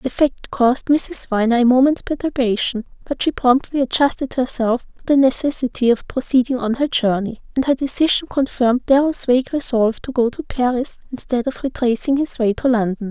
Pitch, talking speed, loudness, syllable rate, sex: 255 Hz, 180 wpm, -18 LUFS, 5.4 syllables/s, female